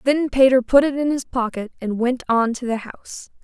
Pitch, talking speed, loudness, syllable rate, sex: 250 Hz, 225 wpm, -19 LUFS, 5.2 syllables/s, female